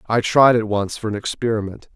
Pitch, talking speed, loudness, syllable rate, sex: 110 Hz, 215 wpm, -19 LUFS, 5.8 syllables/s, male